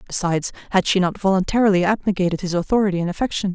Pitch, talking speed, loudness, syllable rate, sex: 190 Hz, 170 wpm, -20 LUFS, 7.5 syllables/s, female